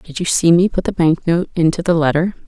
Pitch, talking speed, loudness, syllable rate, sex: 170 Hz, 265 wpm, -16 LUFS, 5.7 syllables/s, female